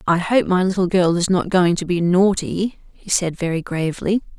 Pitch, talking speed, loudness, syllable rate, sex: 180 Hz, 205 wpm, -19 LUFS, 5.0 syllables/s, female